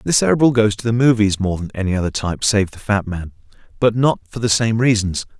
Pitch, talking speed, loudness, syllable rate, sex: 105 Hz, 235 wpm, -17 LUFS, 6.1 syllables/s, male